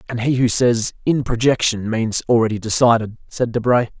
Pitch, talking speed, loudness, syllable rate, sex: 115 Hz, 165 wpm, -18 LUFS, 5.2 syllables/s, male